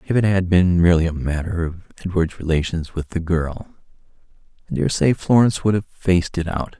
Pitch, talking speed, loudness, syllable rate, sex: 90 Hz, 195 wpm, -20 LUFS, 5.8 syllables/s, male